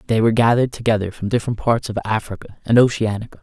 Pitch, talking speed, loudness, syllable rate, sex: 110 Hz, 195 wpm, -19 LUFS, 7.2 syllables/s, male